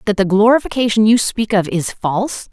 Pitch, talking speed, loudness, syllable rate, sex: 205 Hz, 190 wpm, -15 LUFS, 5.5 syllables/s, female